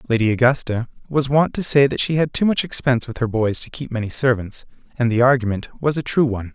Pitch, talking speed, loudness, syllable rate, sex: 130 Hz, 240 wpm, -19 LUFS, 6.3 syllables/s, male